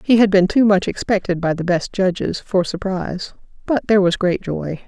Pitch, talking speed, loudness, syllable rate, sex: 190 Hz, 195 wpm, -18 LUFS, 5.3 syllables/s, female